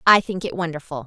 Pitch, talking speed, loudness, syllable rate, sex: 170 Hz, 225 wpm, -22 LUFS, 6.3 syllables/s, female